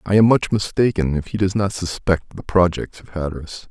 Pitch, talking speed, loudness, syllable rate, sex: 90 Hz, 210 wpm, -20 LUFS, 5.3 syllables/s, male